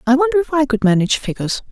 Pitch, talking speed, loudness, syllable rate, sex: 260 Hz, 245 wpm, -16 LUFS, 8.1 syllables/s, female